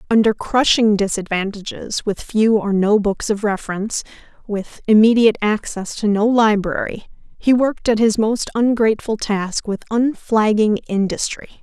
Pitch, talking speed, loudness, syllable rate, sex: 215 Hz, 135 wpm, -18 LUFS, 4.7 syllables/s, female